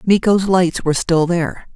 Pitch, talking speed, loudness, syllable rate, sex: 180 Hz, 170 wpm, -16 LUFS, 5.2 syllables/s, female